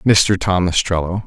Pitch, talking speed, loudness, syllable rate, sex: 90 Hz, 140 wpm, -16 LUFS, 4.1 syllables/s, male